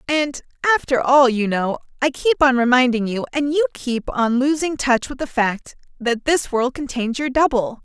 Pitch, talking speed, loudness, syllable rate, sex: 260 Hz, 185 wpm, -19 LUFS, 4.6 syllables/s, female